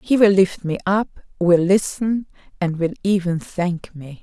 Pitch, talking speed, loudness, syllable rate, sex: 185 Hz, 170 wpm, -19 LUFS, 4.1 syllables/s, female